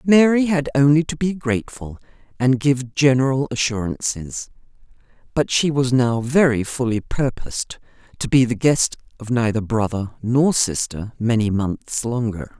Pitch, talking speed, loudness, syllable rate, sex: 125 Hz, 140 wpm, -20 LUFS, 4.5 syllables/s, female